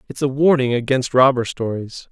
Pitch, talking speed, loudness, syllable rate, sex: 130 Hz, 170 wpm, -18 LUFS, 5.2 syllables/s, male